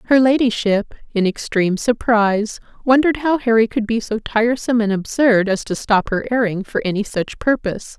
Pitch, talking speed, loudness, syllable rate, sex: 225 Hz, 175 wpm, -18 LUFS, 5.4 syllables/s, female